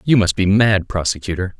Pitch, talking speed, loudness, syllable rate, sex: 100 Hz, 190 wpm, -17 LUFS, 5.4 syllables/s, male